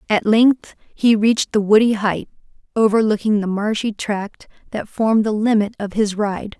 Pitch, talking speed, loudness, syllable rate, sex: 215 Hz, 165 wpm, -18 LUFS, 4.7 syllables/s, female